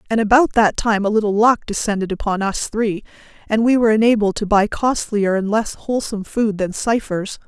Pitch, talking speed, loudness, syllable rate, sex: 210 Hz, 195 wpm, -18 LUFS, 5.5 syllables/s, female